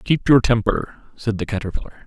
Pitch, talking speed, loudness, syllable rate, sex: 115 Hz, 175 wpm, -20 LUFS, 5.3 syllables/s, male